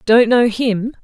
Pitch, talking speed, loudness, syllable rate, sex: 230 Hz, 175 wpm, -14 LUFS, 3.5 syllables/s, female